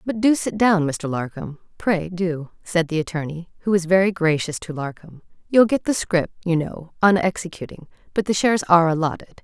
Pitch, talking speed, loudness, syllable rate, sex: 175 Hz, 185 wpm, -21 LUFS, 5.3 syllables/s, female